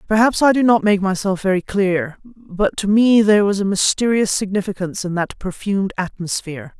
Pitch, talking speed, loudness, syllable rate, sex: 200 Hz, 175 wpm, -17 LUFS, 5.3 syllables/s, female